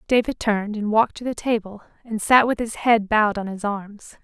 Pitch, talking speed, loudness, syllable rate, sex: 215 Hz, 225 wpm, -21 LUFS, 5.5 syllables/s, female